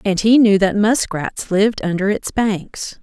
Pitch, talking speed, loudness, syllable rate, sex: 200 Hz, 180 wpm, -16 LUFS, 4.1 syllables/s, female